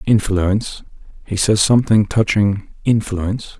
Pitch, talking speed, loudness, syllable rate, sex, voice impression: 105 Hz, 100 wpm, -17 LUFS, 4.5 syllables/s, male, very masculine, very middle-aged, very thick, relaxed, very powerful, dark, soft, very muffled, slightly fluent, raspy, very cool, intellectual, sincere, very calm, very mature, very friendly, reassuring, very unique, elegant, very wild, sweet, very kind, very modest